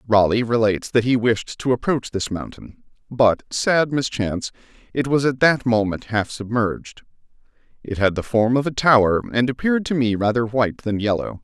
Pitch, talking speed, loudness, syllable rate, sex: 120 Hz, 180 wpm, -20 LUFS, 5.1 syllables/s, male